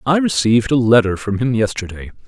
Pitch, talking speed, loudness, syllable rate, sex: 120 Hz, 185 wpm, -16 LUFS, 5.9 syllables/s, male